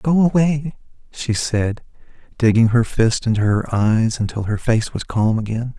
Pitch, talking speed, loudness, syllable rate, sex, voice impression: 115 Hz, 165 wpm, -18 LUFS, 4.3 syllables/s, male, masculine, adult-like, thick, tensed, powerful, slightly dark, slightly muffled, slightly cool, calm, slightly friendly, reassuring, kind, modest